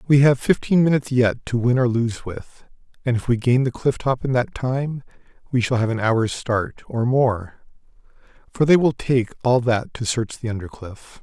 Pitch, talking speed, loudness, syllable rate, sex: 125 Hz, 210 wpm, -20 LUFS, 4.7 syllables/s, male